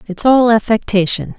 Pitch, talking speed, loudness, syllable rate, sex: 220 Hz, 130 wpm, -13 LUFS, 4.8 syllables/s, female